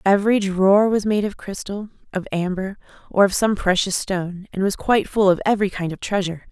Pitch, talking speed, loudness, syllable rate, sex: 195 Hz, 205 wpm, -20 LUFS, 5.9 syllables/s, female